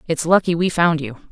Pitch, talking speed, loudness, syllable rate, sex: 165 Hz, 230 wpm, -18 LUFS, 5.6 syllables/s, female